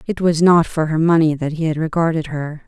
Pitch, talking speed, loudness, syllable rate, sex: 160 Hz, 245 wpm, -17 LUFS, 5.6 syllables/s, female